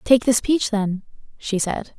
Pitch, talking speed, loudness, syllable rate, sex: 220 Hz, 180 wpm, -21 LUFS, 3.8 syllables/s, female